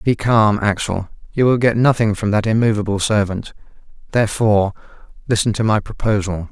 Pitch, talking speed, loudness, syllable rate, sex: 105 Hz, 145 wpm, -17 LUFS, 5.5 syllables/s, male